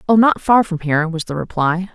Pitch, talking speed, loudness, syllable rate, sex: 180 Hz, 245 wpm, -17 LUFS, 5.7 syllables/s, female